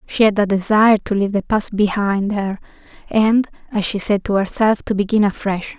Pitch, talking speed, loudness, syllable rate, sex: 205 Hz, 195 wpm, -17 LUFS, 5.4 syllables/s, female